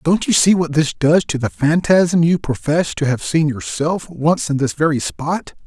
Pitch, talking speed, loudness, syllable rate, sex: 155 Hz, 210 wpm, -17 LUFS, 4.6 syllables/s, male